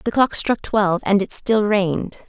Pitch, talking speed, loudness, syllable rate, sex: 205 Hz, 210 wpm, -19 LUFS, 4.8 syllables/s, female